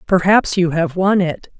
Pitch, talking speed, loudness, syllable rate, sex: 180 Hz, 190 wpm, -16 LUFS, 4.3 syllables/s, female